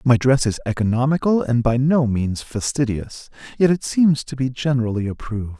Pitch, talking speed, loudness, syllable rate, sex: 125 Hz, 170 wpm, -20 LUFS, 5.2 syllables/s, male